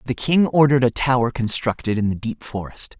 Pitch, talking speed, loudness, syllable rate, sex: 120 Hz, 200 wpm, -20 LUFS, 5.7 syllables/s, male